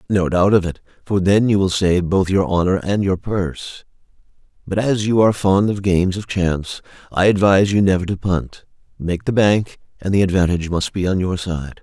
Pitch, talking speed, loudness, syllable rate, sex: 95 Hz, 210 wpm, -18 LUFS, 5.4 syllables/s, male